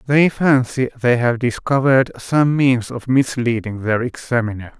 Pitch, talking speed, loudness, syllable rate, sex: 125 Hz, 140 wpm, -17 LUFS, 4.6 syllables/s, male